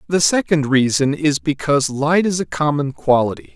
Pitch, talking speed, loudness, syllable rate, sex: 145 Hz, 170 wpm, -17 LUFS, 5.0 syllables/s, male